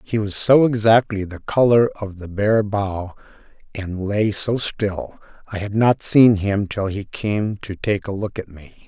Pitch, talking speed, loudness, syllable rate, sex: 105 Hz, 190 wpm, -19 LUFS, 4.0 syllables/s, male